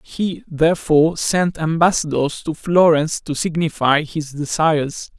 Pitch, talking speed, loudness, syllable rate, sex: 160 Hz, 115 wpm, -18 LUFS, 4.4 syllables/s, male